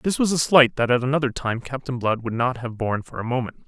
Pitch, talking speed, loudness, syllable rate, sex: 125 Hz, 275 wpm, -22 LUFS, 6.1 syllables/s, male